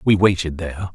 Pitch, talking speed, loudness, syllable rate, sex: 90 Hz, 190 wpm, -20 LUFS, 6.1 syllables/s, male